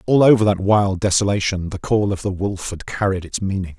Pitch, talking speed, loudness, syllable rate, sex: 100 Hz, 220 wpm, -19 LUFS, 5.5 syllables/s, male